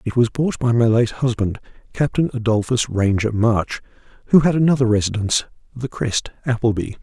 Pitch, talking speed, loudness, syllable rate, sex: 120 Hz, 155 wpm, -19 LUFS, 5.5 syllables/s, male